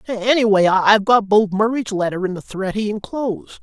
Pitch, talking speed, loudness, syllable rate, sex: 200 Hz, 180 wpm, -17 LUFS, 5.5 syllables/s, male